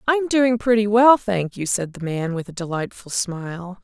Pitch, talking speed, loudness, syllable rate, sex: 200 Hz, 205 wpm, -20 LUFS, 4.6 syllables/s, female